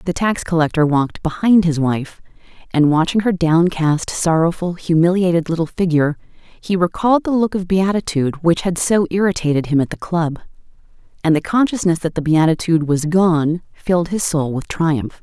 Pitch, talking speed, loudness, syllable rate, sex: 170 Hz, 165 wpm, -17 LUFS, 5.2 syllables/s, female